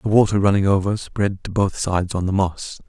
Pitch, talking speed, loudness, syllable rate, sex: 95 Hz, 230 wpm, -20 LUFS, 5.4 syllables/s, male